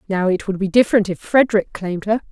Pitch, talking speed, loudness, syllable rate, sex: 200 Hz, 235 wpm, -18 LUFS, 6.7 syllables/s, female